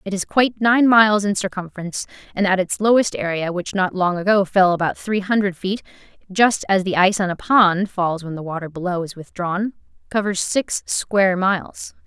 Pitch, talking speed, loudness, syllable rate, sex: 190 Hz, 185 wpm, -19 LUFS, 5.3 syllables/s, female